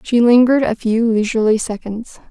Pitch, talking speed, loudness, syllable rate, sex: 230 Hz, 155 wpm, -15 LUFS, 5.6 syllables/s, female